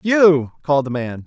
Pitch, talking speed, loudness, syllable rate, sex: 150 Hz, 190 wpm, -17 LUFS, 4.4 syllables/s, male